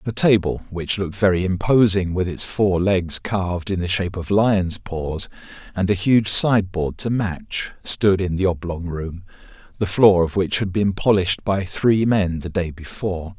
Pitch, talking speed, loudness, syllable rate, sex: 95 Hz, 190 wpm, -20 LUFS, 4.5 syllables/s, male